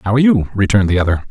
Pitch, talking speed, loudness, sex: 105 Hz, 275 wpm, -14 LUFS, male